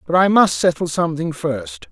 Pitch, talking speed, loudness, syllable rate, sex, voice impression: 150 Hz, 190 wpm, -18 LUFS, 5.2 syllables/s, male, masculine, middle-aged, tensed, powerful, bright, raspy, slightly calm, mature, friendly, wild, lively, strict, intense